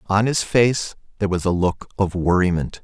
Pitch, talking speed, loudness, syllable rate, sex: 95 Hz, 190 wpm, -20 LUFS, 5.2 syllables/s, male